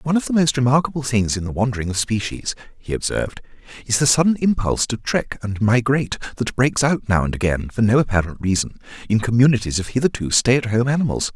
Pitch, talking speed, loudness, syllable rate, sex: 120 Hz, 205 wpm, -19 LUFS, 6.4 syllables/s, male